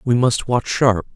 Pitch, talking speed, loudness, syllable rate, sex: 120 Hz, 205 wpm, -18 LUFS, 4.0 syllables/s, male